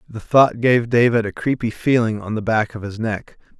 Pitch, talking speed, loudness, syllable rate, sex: 115 Hz, 215 wpm, -19 LUFS, 5.0 syllables/s, male